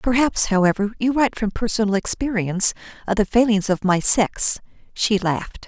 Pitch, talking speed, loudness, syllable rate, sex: 210 Hz, 160 wpm, -20 LUFS, 5.3 syllables/s, female